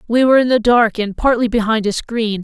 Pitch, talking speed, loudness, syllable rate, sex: 230 Hz, 245 wpm, -15 LUFS, 5.7 syllables/s, female